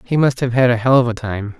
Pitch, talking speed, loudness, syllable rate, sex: 120 Hz, 340 wpm, -16 LUFS, 6.1 syllables/s, male